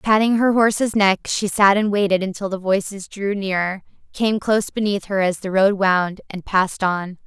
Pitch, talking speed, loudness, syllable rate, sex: 200 Hz, 200 wpm, -19 LUFS, 4.9 syllables/s, female